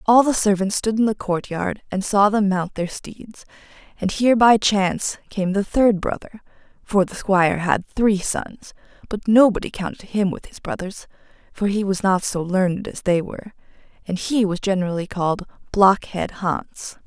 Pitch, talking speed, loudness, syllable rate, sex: 200 Hz, 175 wpm, -20 LUFS, 4.7 syllables/s, female